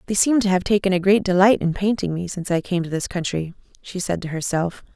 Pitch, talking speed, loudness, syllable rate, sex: 185 Hz, 255 wpm, -21 LUFS, 6.1 syllables/s, female